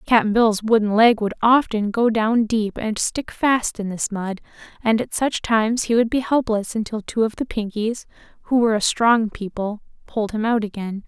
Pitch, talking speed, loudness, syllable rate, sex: 220 Hz, 190 wpm, -20 LUFS, 4.8 syllables/s, female